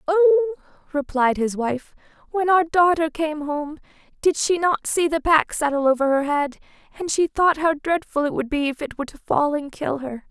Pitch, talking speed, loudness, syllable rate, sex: 305 Hz, 205 wpm, -21 LUFS, 5.0 syllables/s, female